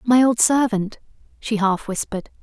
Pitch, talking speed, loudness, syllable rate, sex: 220 Hz, 150 wpm, -19 LUFS, 4.9 syllables/s, female